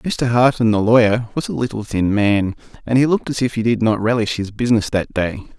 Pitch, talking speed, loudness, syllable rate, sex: 115 Hz, 235 wpm, -17 LUFS, 5.7 syllables/s, male